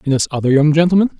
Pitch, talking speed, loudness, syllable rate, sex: 155 Hz, 250 wpm, -14 LUFS, 7.3 syllables/s, male